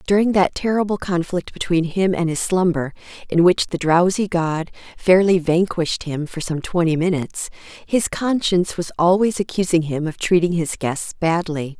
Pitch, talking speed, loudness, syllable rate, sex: 175 Hz, 165 wpm, -19 LUFS, 4.9 syllables/s, female